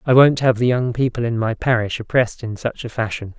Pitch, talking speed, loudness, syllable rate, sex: 120 Hz, 250 wpm, -19 LUFS, 5.8 syllables/s, male